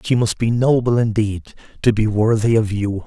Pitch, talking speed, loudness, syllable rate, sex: 110 Hz, 195 wpm, -18 LUFS, 4.8 syllables/s, male